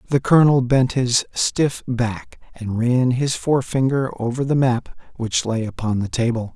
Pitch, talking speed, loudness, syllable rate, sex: 125 Hz, 165 wpm, -20 LUFS, 4.5 syllables/s, male